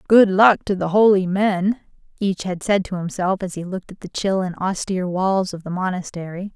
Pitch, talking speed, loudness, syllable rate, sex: 190 Hz, 210 wpm, -20 LUFS, 5.2 syllables/s, female